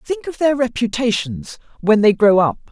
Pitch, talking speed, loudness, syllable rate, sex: 235 Hz, 175 wpm, -17 LUFS, 4.8 syllables/s, female